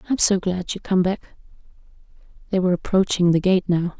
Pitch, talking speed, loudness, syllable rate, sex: 185 Hz, 180 wpm, -20 LUFS, 5.8 syllables/s, female